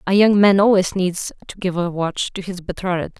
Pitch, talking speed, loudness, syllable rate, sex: 185 Hz, 225 wpm, -18 LUFS, 5.2 syllables/s, female